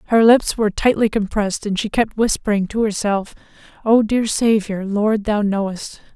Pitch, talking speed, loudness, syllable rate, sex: 210 Hz, 165 wpm, -18 LUFS, 4.9 syllables/s, female